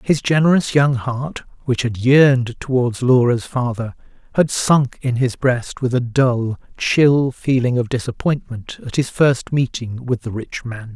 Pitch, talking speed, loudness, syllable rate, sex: 125 Hz, 165 wpm, -18 LUFS, 4.1 syllables/s, male